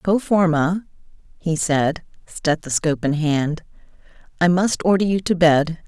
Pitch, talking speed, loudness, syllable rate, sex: 165 Hz, 135 wpm, -19 LUFS, 4.3 syllables/s, female